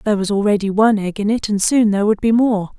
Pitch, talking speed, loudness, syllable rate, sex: 210 Hz, 280 wpm, -16 LUFS, 6.9 syllables/s, female